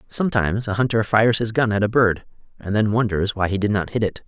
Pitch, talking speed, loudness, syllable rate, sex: 105 Hz, 255 wpm, -20 LUFS, 6.4 syllables/s, male